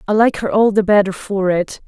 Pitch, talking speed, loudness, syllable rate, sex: 200 Hz, 255 wpm, -16 LUFS, 5.4 syllables/s, female